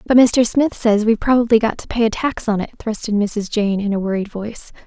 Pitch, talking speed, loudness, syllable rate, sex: 220 Hz, 260 wpm, -17 LUFS, 5.8 syllables/s, female